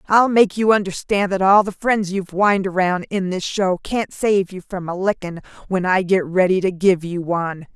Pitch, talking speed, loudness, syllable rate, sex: 190 Hz, 215 wpm, -19 LUFS, 5.0 syllables/s, female